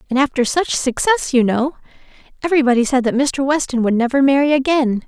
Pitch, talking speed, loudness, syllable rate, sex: 265 Hz, 175 wpm, -16 LUFS, 6.0 syllables/s, female